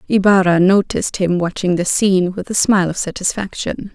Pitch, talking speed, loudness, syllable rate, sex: 190 Hz, 165 wpm, -16 LUFS, 5.6 syllables/s, female